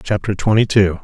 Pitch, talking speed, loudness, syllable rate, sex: 100 Hz, 175 wpm, -16 LUFS, 5.4 syllables/s, male